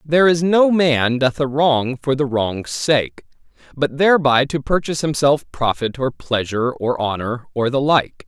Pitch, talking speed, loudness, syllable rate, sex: 140 Hz, 175 wpm, -18 LUFS, 4.5 syllables/s, male